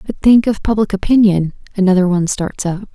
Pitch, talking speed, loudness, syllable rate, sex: 200 Hz, 185 wpm, -14 LUFS, 5.9 syllables/s, female